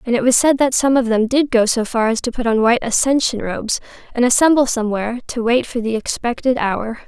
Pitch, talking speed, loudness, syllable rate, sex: 240 Hz, 235 wpm, -17 LUFS, 6.0 syllables/s, female